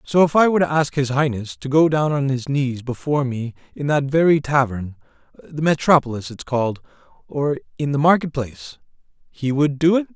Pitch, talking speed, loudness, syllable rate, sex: 140 Hz, 185 wpm, -20 LUFS, 5.4 syllables/s, male